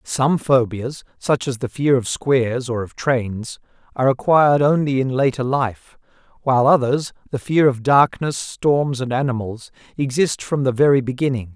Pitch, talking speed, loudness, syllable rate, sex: 130 Hz, 160 wpm, -19 LUFS, 4.7 syllables/s, male